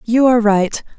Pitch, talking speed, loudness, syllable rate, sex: 225 Hz, 185 wpm, -14 LUFS, 5.2 syllables/s, female